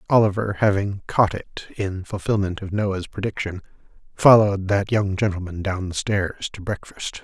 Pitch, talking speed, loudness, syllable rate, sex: 100 Hz, 150 wpm, -22 LUFS, 4.8 syllables/s, male